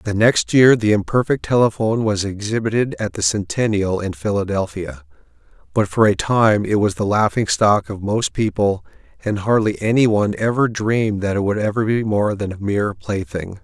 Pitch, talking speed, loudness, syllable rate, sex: 105 Hz, 175 wpm, -18 LUFS, 5.1 syllables/s, male